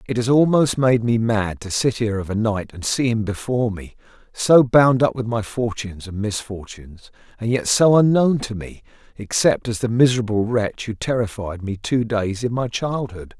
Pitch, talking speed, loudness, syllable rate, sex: 115 Hz, 195 wpm, -20 LUFS, 5.0 syllables/s, male